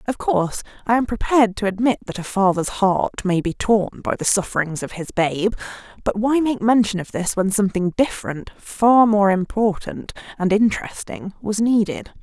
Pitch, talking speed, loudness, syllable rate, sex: 205 Hz, 175 wpm, -20 LUFS, 5.0 syllables/s, female